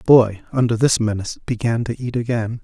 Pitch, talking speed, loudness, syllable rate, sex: 115 Hz, 205 wpm, -19 LUFS, 6.1 syllables/s, male